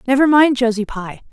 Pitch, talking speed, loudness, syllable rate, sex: 250 Hz, 180 wpm, -15 LUFS, 5.4 syllables/s, female